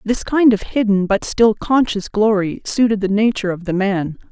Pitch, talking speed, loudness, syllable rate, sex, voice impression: 210 Hz, 195 wpm, -17 LUFS, 4.9 syllables/s, female, very feminine, very adult-like, middle-aged, slightly tensed, slightly weak, bright, hard, very clear, fluent, slightly cool, very intellectual, refreshing, very sincere, very friendly, reassuring, very unique, very elegant, slightly wild, sweet, kind, slightly strict